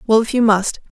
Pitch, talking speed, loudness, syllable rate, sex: 220 Hz, 245 wpm, -16 LUFS, 5.7 syllables/s, female